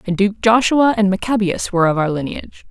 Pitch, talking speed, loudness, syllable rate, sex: 200 Hz, 200 wpm, -16 LUFS, 6.1 syllables/s, female